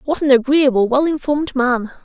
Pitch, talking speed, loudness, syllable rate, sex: 270 Hz, 175 wpm, -16 LUFS, 5.4 syllables/s, female